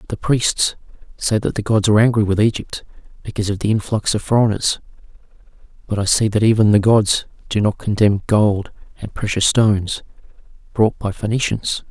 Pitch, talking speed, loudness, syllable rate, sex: 105 Hz, 165 wpm, -17 LUFS, 5.4 syllables/s, male